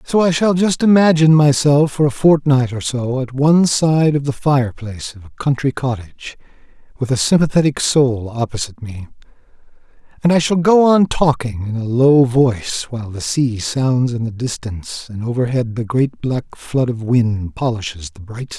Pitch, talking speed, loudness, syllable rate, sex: 130 Hz, 180 wpm, -16 LUFS, 5.0 syllables/s, male